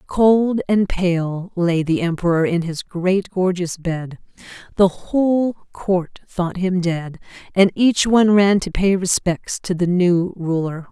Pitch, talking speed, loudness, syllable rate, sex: 185 Hz, 155 wpm, -18 LUFS, 3.7 syllables/s, female